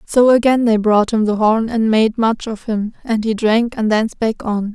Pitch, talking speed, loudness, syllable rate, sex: 220 Hz, 240 wpm, -16 LUFS, 4.7 syllables/s, female